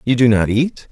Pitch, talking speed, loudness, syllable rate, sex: 120 Hz, 265 wpm, -15 LUFS, 5.1 syllables/s, male